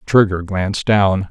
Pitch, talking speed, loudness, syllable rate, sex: 100 Hz, 140 wpm, -16 LUFS, 4.2 syllables/s, male